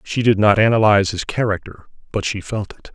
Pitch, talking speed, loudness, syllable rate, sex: 105 Hz, 205 wpm, -18 LUFS, 5.9 syllables/s, male